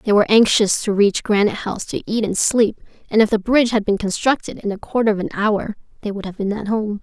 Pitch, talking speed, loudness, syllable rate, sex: 210 Hz, 255 wpm, -18 LUFS, 6.2 syllables/s, female